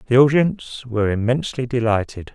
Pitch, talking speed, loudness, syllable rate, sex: 125 Hz, 130 wpm, -19 LUFS, 6.2 syllables/s, male